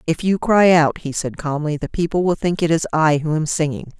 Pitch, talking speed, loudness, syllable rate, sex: 160 Hz, 255 wpm, -18 LUFS, 5.4 syllables/s, female